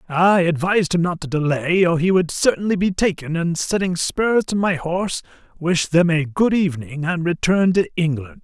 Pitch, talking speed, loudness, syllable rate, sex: 170 Hz, 190 wpm, -19 LUFS, 5.1 syllables/s, male